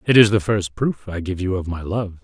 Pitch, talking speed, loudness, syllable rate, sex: 95 Hz, 295 wpm, -20 LUFS, 5.4 syllables/s, male